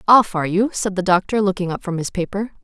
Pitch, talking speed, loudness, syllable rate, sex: 195 Hz, 250 wpm, -19 LUFS, 6.3 syllables/s, female